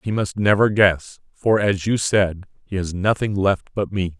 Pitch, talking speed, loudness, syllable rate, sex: 100 Hz, 200 wpm, -20 LUFS, 4.3 syllables/s, male